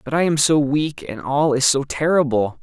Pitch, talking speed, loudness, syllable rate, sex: 140 Hz, 230 wpm, -18 LUFS, 4.8 syllables/s, male